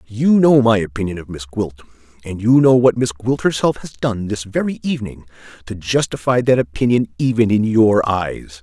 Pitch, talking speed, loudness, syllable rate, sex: 110 Hz, 190 wpm, -17 LUFS, 5.0 syllables/s, male